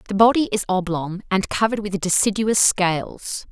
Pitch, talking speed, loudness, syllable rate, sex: 195 Hz, 155 wpm, -20 LUFS, 5.1 syllables/s, female